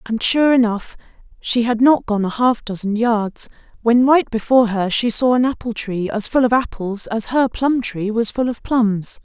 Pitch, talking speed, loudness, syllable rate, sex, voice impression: 230 Hz, 210 wpm, -17 LUFS, 4.6 syllables/s, female, very feminine, slightly adult-like, thin, very tensed, slightly powerful, very bright, hard, very clear, fluent, slightly raspy, cool, very intellectual, refreshing, sincere, calm, friendly, reassuring, very unique, elegant, wild, slightly sweet, very lively, strict, intense, slightly sharp